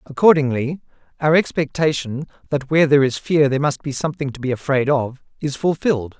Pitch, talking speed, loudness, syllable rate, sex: 140 Hz, 175 wpm, -19 LUFS, 6.1 syllables/s, male